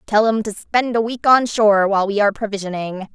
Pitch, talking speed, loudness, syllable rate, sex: 215 Hz, 230 wpm, -17 LUFS, 6.0 syllables/s, female